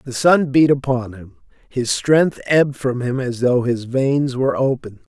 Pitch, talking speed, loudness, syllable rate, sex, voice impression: 130 Hz, 185 wpm, -18 LUFS, 4.7 syllables/s, male, masculine, adult-like, slightly middle-aged, slightly thick, slightly relaxed, slightly weak, slightly dark, soft, slightly muffled, cool, intellectual, slightly refreshing, slightly sincere, calm, mature, friendly, slightly reassuring, unique, elegant, sweet, slightly lively, kind, modest